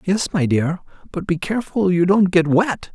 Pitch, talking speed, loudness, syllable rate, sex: 180 Hz, 205 wpm, -18 LUFS, 4.7 syllables/s, male